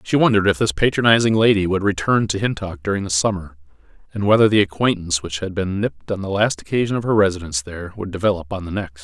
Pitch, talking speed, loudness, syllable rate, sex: 95 Hz, 225 wpm, -19 LUFS, 6.8 syllables/s, male